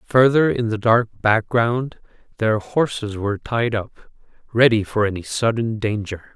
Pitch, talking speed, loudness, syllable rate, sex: 110 Hz, 140 wpm, -20 LUFS, 4.3 syllables/s, male